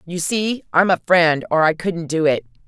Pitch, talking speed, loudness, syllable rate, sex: 170 Hz, 225 wpm, -18 LUFS, 4.6 syllables/s, female